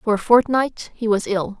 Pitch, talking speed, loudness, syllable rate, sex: 220 Hz, 225 wpm, -19 LUFS, 4.6 syllables/s, female